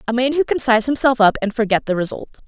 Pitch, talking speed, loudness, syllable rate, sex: 235 Hz, 265 wpm, -17 LUFS, 6.5 syllables/s, female